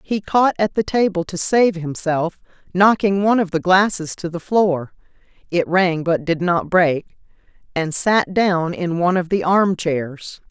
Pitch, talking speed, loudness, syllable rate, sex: 180 Hz, 160 wpm, -18 LUFS, 4.2 syllables/s, female